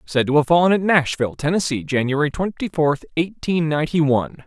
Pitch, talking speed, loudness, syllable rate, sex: 155 Hz, 175 wpm, -19 LUFS, 5.9 syllables/s, male